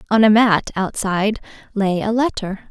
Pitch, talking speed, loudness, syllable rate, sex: 210 Hz, 155 wpm, -18 LUFS, 5.0 syllables/s, female